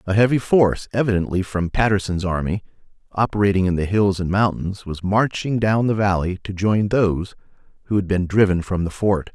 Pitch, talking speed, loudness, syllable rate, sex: 100 Hz, 180 wpm, -20 LUFS, 5.4 syllables/s, male